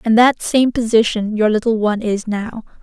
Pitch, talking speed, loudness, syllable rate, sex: 220 Hz, 190 wpm, -16 LUFS, 5.0 syllables/s, female